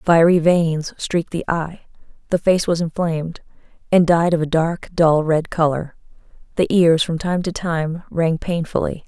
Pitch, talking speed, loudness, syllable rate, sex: 165 Hz, 165 wpm, -19 LUFS, 4.4 syllables/s, female